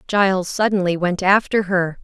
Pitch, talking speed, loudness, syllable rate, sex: 190 Hz, 145 wpm, -18 LUFS, 4.8 syllables/s, female